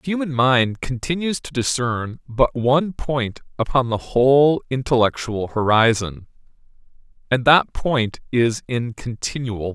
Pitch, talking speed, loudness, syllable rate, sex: 125 Hz, 130 wpm, -20 LUFS, 4.4 syllables/s, male